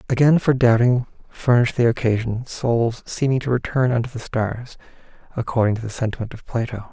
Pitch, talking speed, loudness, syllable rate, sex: 120 Hz, 165 wpm, -20 LUFS, 5.5 syllables/s, male